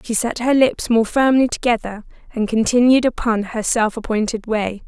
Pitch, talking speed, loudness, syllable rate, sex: 230 Hz, 170 wpm, -18 LUFS, 4.9 syllables/s, female